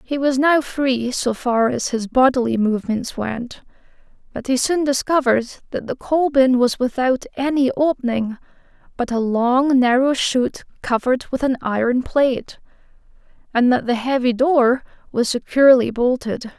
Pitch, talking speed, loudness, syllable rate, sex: 255 Hz, 150 wpm, -19 LUFS, 4.7 syllables/s, female